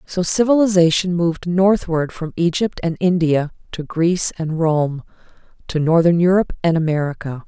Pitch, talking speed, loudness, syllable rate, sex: 170 Hz, 135 wpm, -18 LUFS, 5.1 syllables/s, female